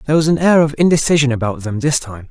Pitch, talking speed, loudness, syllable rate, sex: 140 Hz, 260 wpm, -15 LUFS, 7.1 syllables/s, male